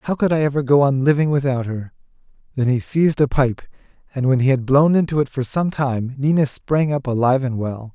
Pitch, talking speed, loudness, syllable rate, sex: 135 Hz, 225 wpm, -19 LUFS, 5.7 syllables/s, male